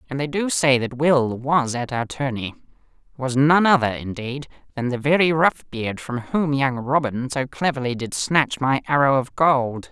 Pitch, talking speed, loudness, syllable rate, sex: 135 Hz, 175 wpm, -21 LUFS, 4.4 syllables/s, male